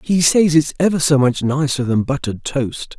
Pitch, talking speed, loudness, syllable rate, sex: 145 Hz, 200 wpm, -17 LUFS, 4.9 syllables/s, male